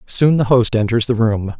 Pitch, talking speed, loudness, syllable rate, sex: 115 Hz, 225 wpm, -15 LUFS, 4.8 syllables/s, male